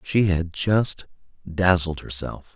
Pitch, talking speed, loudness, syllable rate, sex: 90 Hz, 120 wpm, -23 LUFS, 3.4 syllables/s, male